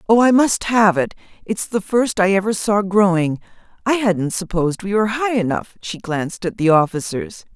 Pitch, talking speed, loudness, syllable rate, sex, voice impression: 200 Hz, 185 wpm, -18 LUFS, 5.1 syllables/s, female, very feminine, very middle-aged, thin, very tensed, powerful, slightly bright, hard, clear, fluent, slightly raspy, cool, slightly intellectual, slightly refreshing, sincere, slightly calm, slightly friendly, slightly reassuring, unique, slightly elegant, wild, slightly sweet, lively, very strict, intense, sharp